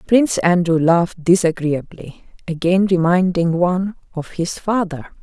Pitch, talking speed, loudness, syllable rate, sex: 175 Hz, 115 wpm, -17 LUFS, 4.5 syllables/s, female